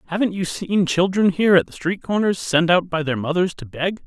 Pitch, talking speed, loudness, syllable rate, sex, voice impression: 175 Hz, 235 wpm, -20 LUFS, 5.5 syllables/s, male, very masculine, adult-like, thick, cool, intellectual, slightly calm, slightly wild